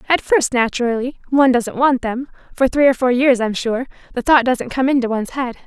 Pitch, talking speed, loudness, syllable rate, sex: 255 Hz, 210 wpm, -17 LUFS, 5.7 syllables/s, female